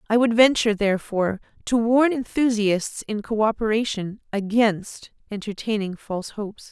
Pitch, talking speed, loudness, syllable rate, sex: 215 Hz, 115 wpm, -22 LUFS, 5.1 syllables/s, female